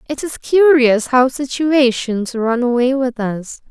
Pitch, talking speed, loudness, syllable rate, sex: 255 Hz, 145 wpm, -15 LUFS, 3.8 syllables/s, female